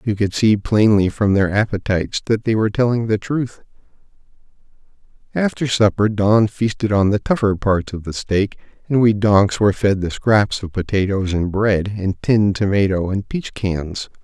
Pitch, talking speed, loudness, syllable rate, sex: 105 Hz, 175 wpm, -18 LUFS, 4.7 syllables/s, male